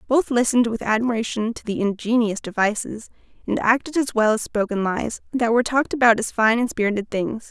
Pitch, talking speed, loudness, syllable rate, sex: 230 Hz, 190 wpm, -21 LUFS, 5.8 syllables/s, female